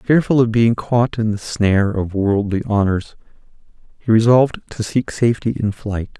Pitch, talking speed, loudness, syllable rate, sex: 110 Hz, 165 wpm, -17 LUFS, 4.9 syllables/s, male